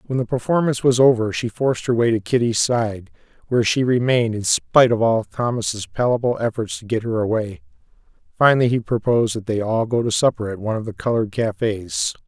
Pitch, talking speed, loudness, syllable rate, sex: 115 Hz, 200 wpm, -20 LUFS, 6.0 syllables/s, male